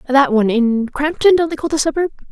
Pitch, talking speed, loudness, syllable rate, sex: 280 Hz, 210 wpm, -16 LUFS, 6.4 syllables/s, female